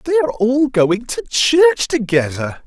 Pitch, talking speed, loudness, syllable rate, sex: 170 Hz, 160 wpm, -16 LUFS, 4.2 syllables/s, male